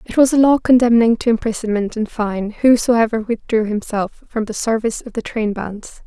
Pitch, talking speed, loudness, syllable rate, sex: 225 Hz, 180 wpm, -17 LUFS, 5.1 syllables/s, female